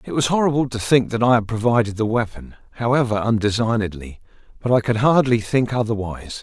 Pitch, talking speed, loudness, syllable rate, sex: 115 Hz, 180 wpm, -19 LUFS, 6.0 syllables/s, male